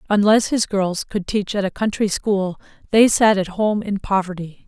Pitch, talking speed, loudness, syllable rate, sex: 200 Hz, 180 wpm, -19 LUFS, 4.4 syllables/s, female